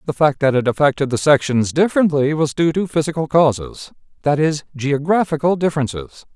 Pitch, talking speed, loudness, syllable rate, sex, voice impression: 150 Hz, 150 wpm, -17 LUFS, 5.6 syllables/s, male, masculine, middle-aged, tensed, powerful, clear, fluent, cool, calm, friendly, wild, lively, strict